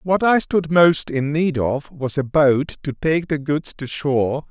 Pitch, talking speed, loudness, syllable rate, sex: 150 Hz, 215 wpm, -19 LUFS, 3.9 syllables/s, male